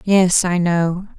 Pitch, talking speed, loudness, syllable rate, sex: 180 Hz, 150 wpm, -16 LUFS, 2.9 syllables/s, female